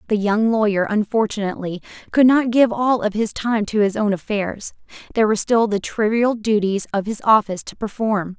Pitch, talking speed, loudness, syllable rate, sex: 215 Hz, 185 wpm, -19 LUFS, 5.4 syllables/s, female